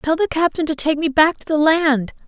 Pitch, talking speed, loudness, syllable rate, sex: 310 Hz, 265 wpm, -17 LUFS, 5.3 syllables/s, female